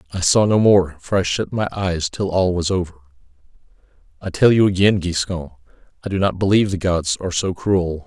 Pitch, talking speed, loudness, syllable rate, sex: 90 Hz, 200 wpm, -18 LUFS, 5.6 syllables/s, male